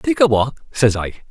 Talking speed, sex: 230 wpm, male